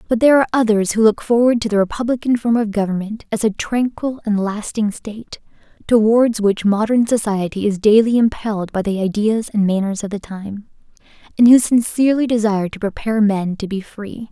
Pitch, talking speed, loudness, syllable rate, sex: 215 Hz, 185 wpm, -17 LUFS, 5.6 syllables/s, female